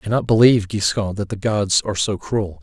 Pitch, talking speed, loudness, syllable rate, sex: 105 Hz, 230 wpm, -18 LUFS, 5.8 syllables/s, male